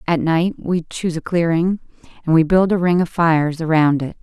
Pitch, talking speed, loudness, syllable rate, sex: 165 Hz, 215 wpm, -18 LUFS, 5.3 syllables/s, female